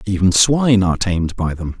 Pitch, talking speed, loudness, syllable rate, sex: 100 Hz, 200 wpm, -16 LUFS, 6.1 syllables/s, male